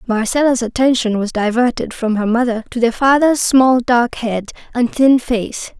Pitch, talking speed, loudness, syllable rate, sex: 240 Hz, 165 wpm, -15 LUFS, 4.6 syllables/s, female